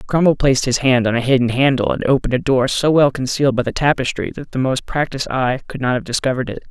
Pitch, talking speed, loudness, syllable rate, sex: 130 Hz, 250 wpm, -17 LUFS, 6.7 syllables/s, male